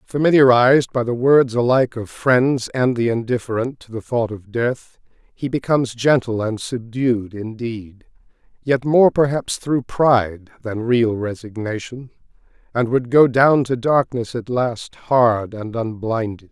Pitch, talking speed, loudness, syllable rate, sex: 120 Hz, 145 wpm, -18 LUFS, 4.2 syllables/s, male